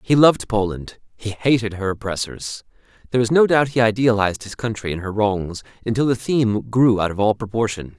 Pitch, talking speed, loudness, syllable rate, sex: 110 Hz, 195 wpm, -20 LUFS, 5.7 syllables/s, male